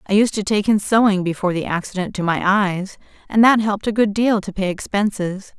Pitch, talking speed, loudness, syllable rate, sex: 200 Hz, 225 wpm, -18 LUFS, 5.7 syllables/s, female